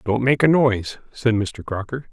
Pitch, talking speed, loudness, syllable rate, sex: 120 Hz, 200 wpm, -20 LUFS, 4.8 syllables/s, male